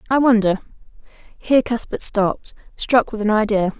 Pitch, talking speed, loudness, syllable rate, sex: 220 Hz, 140 wpm, -18 LUFS, 5.2 syllables/s, female